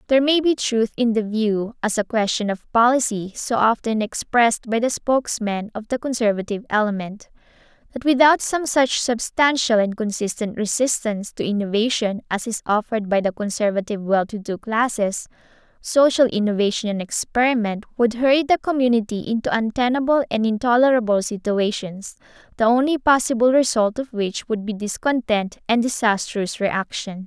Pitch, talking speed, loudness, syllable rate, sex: 225 Hz, 145 wpm, -20 LUFS, 5.1 syllables/s, female